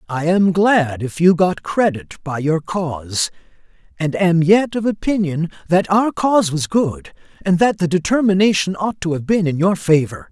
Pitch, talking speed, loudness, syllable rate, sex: 175 Hz, 180 wpm, -17 LUFS, 4.6 syllables/s, male